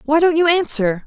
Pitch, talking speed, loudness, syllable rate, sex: 300 Hz, 225 wpm, -16 LUFS, 5.4 syllables/s, female